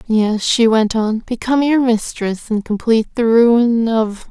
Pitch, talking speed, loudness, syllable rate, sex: 225 Hz, 165 wpm, -15 LUFS, 4.1 syllables/s, female